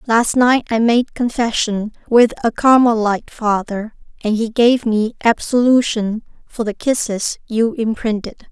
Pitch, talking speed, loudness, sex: 225 Hz, 135 wpm, -16 LUFS, female